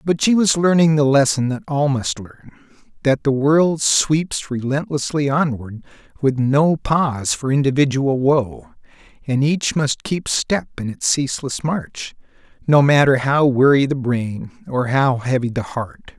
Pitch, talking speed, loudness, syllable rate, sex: 140 Hz, 155 wpm, -18 LUFS, 4.2 syllables/s, male